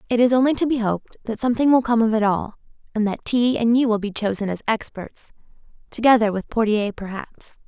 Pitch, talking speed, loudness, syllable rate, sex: 225 Hz, 210 wpm, -20 LUFS, 5.3 syllables/s, female